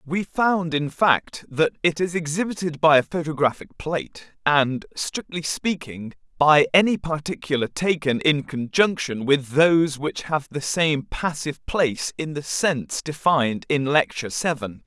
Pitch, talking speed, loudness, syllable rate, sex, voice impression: 150 Hz, 145 wpm, -22 LUFS, 4.4 syllables/s, male, very masculine, very tensed, very powerful, bright, hard, very clear, very fluent, cool, slightly intellectual, refreshing, sincere, slightly calm, slightly mature, unique, very wild, slightly sweet, very lively, very strict, very intense, sharp